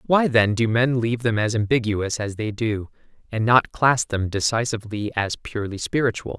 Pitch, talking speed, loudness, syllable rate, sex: 115 Hz, 180 wpm, -22 LUFS, 5.1 syllables/s, male